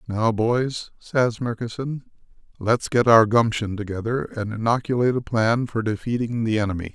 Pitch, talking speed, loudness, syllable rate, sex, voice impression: 115 Hz, 145 wpm, -22 LUFS, 4.9 syllables/s, male, masculine, middle-aged, slightly powerful, soft, slightly muffled, intellectual, mature, wild, slightly strict, modest